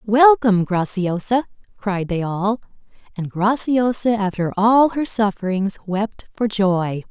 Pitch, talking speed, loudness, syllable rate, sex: 205 Hz, 120 wpm, -19 LUFS, 3.8 syllables/s, female